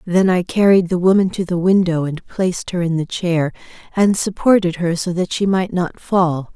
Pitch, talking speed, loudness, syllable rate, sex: 180 Hz, 210 wpm, -17 LUFS, 4.8 syllables/s, female